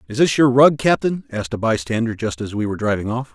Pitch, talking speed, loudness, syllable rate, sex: 120 Hz, 250 wpm, -19 LUFS, 6.4 syllables/s, male